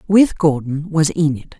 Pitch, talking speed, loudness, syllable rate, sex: 155 Hz, 150 wpm, -17 LUFS, 4.3 syllables/s, female